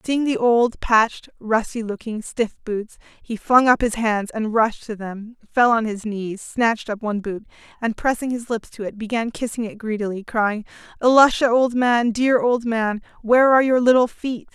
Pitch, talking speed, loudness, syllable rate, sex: 230 Hz, 195 wpm, -20 LUFS, 4.9 syllables/s, female